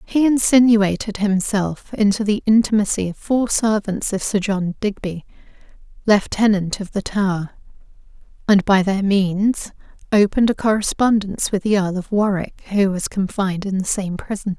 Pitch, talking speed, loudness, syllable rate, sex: 200 Hz, 150 wpm, -19 LUFS, 4.8 syllables/s, female